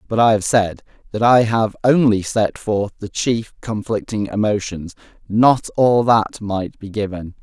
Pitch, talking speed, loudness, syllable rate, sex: 105 Hz, 160 wpm, -18 LUFS, 4.1 syllables/s, male